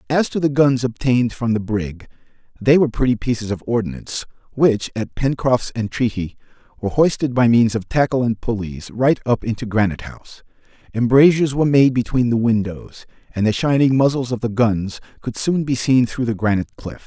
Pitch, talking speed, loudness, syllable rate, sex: 120 Hz, 185 wpm, -18 LUFS, 5.6 syllables/s, male